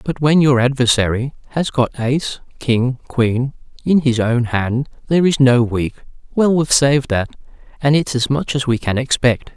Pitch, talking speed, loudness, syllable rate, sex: 130 Hz, 180 wpm, -17 LUFS, 4.8 syllables/s, male